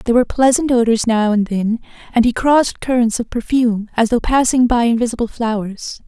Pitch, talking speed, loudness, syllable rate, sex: 235 Hz, 190 wpm, -16 LUFS, 5.7 syllables/s, female